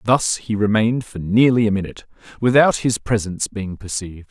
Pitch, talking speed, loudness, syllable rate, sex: 110 Hz, 165 wpm, -19 LUFS, 5.8 syllables/s, male